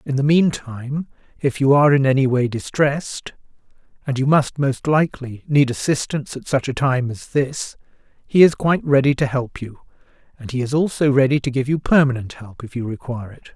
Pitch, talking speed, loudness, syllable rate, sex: 135 Hz, 185 wpm, -19 LUFS, 5.6 syllables/s, male